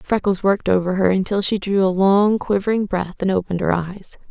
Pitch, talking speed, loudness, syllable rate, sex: 195 Hz, 210 wpm, -19 LUFS, 5.6 syllables/s, female